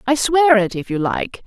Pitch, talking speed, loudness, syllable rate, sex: 240 Hz, 245 wpm, -17 LUFS, 4.6 syllables/s, female